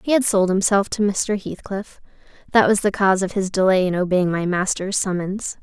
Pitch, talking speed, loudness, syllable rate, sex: 195 Hz, 205 wpm, -20 LUFS, 5.2 syllables/s, female